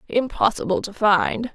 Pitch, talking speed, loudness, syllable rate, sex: 200 Hz, 115 wpm, -21 LUFS, 4.3 syllables/s, female